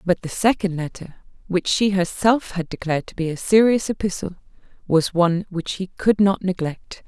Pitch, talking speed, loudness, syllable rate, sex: 185 Hz, 180 wpm, -21 LUFS, 5.1 syllables/s, female